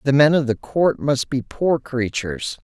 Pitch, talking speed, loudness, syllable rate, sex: 140 Hz, 200 wpm, -20 LUFS, 4.4 syllables/s, male